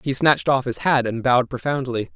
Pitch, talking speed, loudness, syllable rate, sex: 130 Hz, 225 wpm, -20 LUFS, 5.9 syllables/s, male